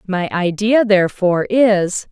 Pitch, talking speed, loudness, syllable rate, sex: 195 Hz, 115 wpm, -15 LUFS, 4.2 syllables/s, female